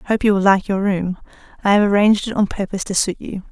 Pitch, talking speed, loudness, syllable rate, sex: 200 Hz, 275 wpm, -17 LUFS, 6.9 syllables/s, female